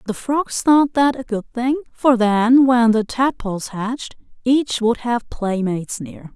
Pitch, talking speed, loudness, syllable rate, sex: 240 Hz, 170 wpm, -18 LUFS, 4.1 syllables/s, female